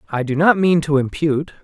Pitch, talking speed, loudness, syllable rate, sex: 145 Hz, 220 wpm, -17 LUFS, 6.1 syllables/s, male